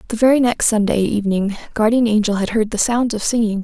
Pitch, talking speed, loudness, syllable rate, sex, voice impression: 220 Hz, 215 wpm, -17 LUFS, 6.2 syllables/s, female, feminine, slightly young, slightly relaxed, soft, slightly clear, raspy, intellectual, calm, slightly friendly, reassuring, elegant, slightly sharp